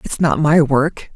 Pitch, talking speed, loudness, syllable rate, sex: 150 Hz, 210 wpm, -15 LUFS, 3.8 syllables/s, female